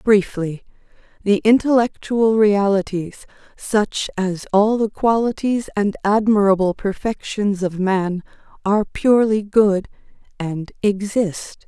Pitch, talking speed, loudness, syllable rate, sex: 205 Hz, 100 wpm, -19 LUFS, 3.8 syllables/s, female